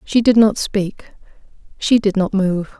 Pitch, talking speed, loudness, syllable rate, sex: 205 Hz, 170 wpm, -16 LUFS, 4.0 syllables/s, female